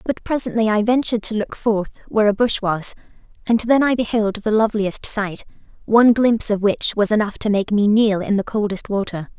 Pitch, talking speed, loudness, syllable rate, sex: 215 Hz, 200 wpm, -18 LUFS, 5.6 syllables/s, female